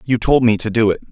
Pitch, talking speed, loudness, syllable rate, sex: 115 Hz, 320 wpm, -15 LUFS, 6.5 syllables/s, male